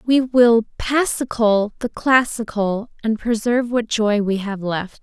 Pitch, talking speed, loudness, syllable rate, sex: 225 Hz, 145 wpm, -19 LUFS, 3.9 syllables/s, female